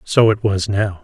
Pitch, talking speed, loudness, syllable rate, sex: 100 Hz, 235 wpm, -17 LUFS, 4.3 syllables/s, male